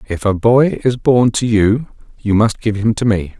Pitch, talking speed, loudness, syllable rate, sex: 110 Hz, 230 wpm, -15 LUFS, 4.4 syllables/s, male